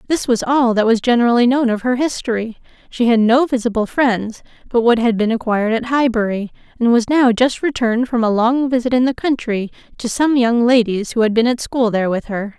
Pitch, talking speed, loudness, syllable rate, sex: 235 Hz, 220 wpm, -16 LUFS, 5.6 syllables/s, female